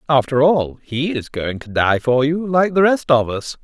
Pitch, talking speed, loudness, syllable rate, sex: 140 Hz, 230 wpm, -17 LUFS, 4.5 syllables/s, male